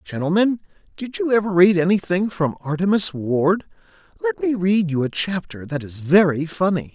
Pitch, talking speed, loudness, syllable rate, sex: 175 Hz, 165 wpm, -20 LUFS, 5.0 syllables/s, male